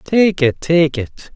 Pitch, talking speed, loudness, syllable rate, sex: 150 Hz, 175 wpm, -15 LUFS, 3.1 syllables/s, male